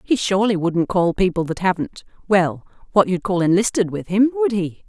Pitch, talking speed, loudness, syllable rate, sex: 190 Hz, 185 wpm, -19 LUFS, 5.2 syllables/s, female